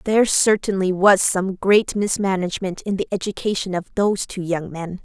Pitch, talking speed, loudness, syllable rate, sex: 190 Hz, 165 wpm, -20 LUFS, 5.2 syllables/s, female